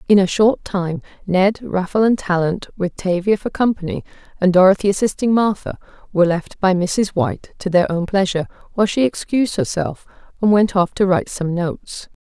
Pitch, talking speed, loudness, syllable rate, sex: 190 Hz, 175 wpm, -18 LUFS, 5.5 syllables/s, female